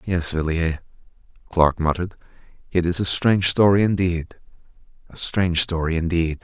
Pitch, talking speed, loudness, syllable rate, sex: 85 Hz, 130 wpm, -21 LUFS, 5.5 syllables/s, male